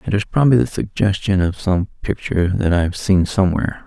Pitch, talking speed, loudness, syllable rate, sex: 95 Hz, 200 wpm, -18 LUFS, 6.2 syllables/s, male